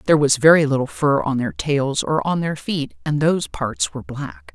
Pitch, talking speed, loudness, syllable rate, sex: 130 Hz, 225 wpm, -19 LUFS, 5.0 syllables/s, female